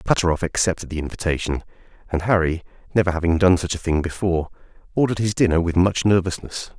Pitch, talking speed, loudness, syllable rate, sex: 85 Hz, 170 wpm, -21 LUFS, 6.7 syllables/s, male